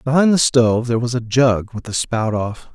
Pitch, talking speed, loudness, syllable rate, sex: 120 Hz, 240 wpm, -17 LUFS, 5.3 syllables/s, male